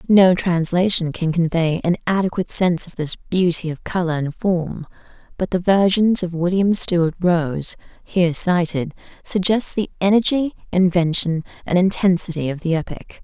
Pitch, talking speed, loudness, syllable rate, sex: 175 Hz, 145 wpm, -19 LUFS, 4.8 syllables/s, female